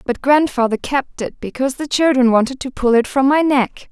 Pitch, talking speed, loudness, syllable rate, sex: 260 Hz, 215 wpm, -16 LUFS, 5.3 syllables/s, female